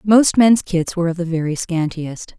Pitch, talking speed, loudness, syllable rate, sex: 180 Hz, 200 wpm, -17 LUFS, 4.8 syllables/s, female